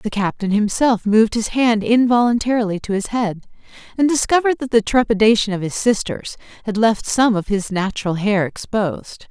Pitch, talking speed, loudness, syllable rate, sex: 220 Hz, 170 wpm, -18 LUFS, 5.3 syllables/s, female